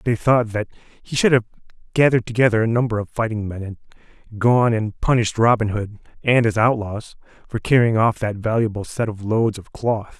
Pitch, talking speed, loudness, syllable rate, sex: 115 Hz, 195 wpm, -20 LUFS, 5.5 syllables/s, male